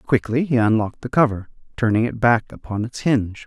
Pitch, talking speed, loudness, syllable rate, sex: 115 Hz, 190 wpm, -20 LUFS, 5.8 syllables/s, male